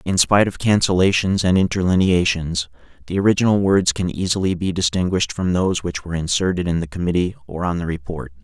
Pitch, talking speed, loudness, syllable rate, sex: 90 Hz, 180 wpm, -19 LUFS, 6.2 syllables/s, male